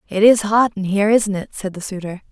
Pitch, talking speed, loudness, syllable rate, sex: 200 Hz, 260 wpm, -17 LUFS, 6.0 syllables/s, female